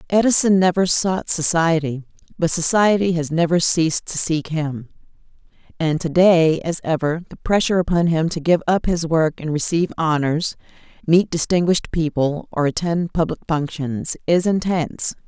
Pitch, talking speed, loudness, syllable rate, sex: 165 Hz, 150 wpm, -19 LUFS, 4.9 syllables/s, female